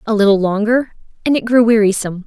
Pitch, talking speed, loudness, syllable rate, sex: 215 Hz, 185 wpm, -14 LUFS, 6.5 syllables/s, female